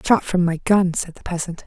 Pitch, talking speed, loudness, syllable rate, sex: 180 Hz, 290 wpm, -20 LUFS, 6.0 syllables/s, female